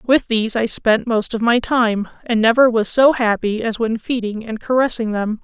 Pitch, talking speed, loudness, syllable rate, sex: 230 Hz, 210 wpm, -17 LUFS, 5.0 syllables/s, female